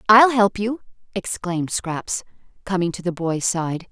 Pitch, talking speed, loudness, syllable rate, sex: 190 Hz, 155 wpm, -21 LUFS, 4.3 syllables/s, female